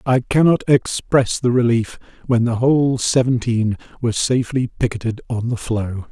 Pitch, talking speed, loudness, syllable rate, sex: 120 Hz, 145 wpm, -18 LUFS, 4.9 syllables/s, male